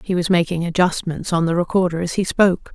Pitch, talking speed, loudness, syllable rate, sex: 175 Hz, 220 wpm, -19 LUFS, 6.1 syllables/s, female